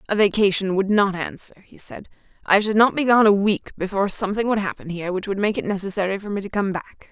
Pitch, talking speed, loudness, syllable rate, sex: 200 Hz, 245 wpm, -21 LUFS, 6.4 syllables/s, female